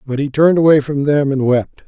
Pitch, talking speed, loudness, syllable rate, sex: 145 Hz, 255 wpm, -14 LUFS, 5.7 syllables/s, male